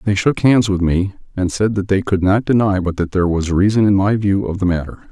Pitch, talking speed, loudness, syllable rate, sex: 100 Hz, 270 wpm, -16 LUFS, 5.6 syllables/s, male